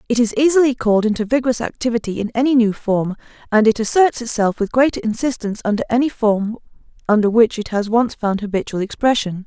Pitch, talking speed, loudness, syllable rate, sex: 230 Hz, 185 wpm, -18 LUFS, 6.1 syllables/s, female